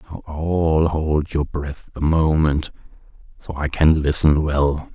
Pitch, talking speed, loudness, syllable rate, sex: 75 Hz, 145 wpm, -19 LUFS, 3.4 syllables/s, male